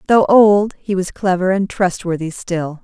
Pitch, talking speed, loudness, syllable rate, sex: 190 Hz, 170 wpm, -16 LUFS, 4.3 syllables/s, female